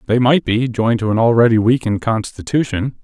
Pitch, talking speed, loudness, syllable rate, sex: 115 Hz, 180 wpm, -16 LUFS, 6.0 syllables/s, male